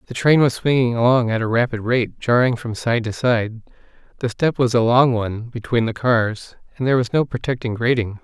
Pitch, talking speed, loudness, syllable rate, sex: 120 Hz, 210 wpm, -19 LUFS, 5.4 syllables/s, male